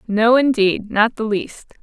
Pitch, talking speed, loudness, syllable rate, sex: 225 Hz, 130 wpm, -17 LUFS, 3.9 syllables/s, female